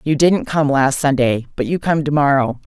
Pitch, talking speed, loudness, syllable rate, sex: 145 Hz, 195 wpm, -16 LUFS, 4.9 syllables/s, female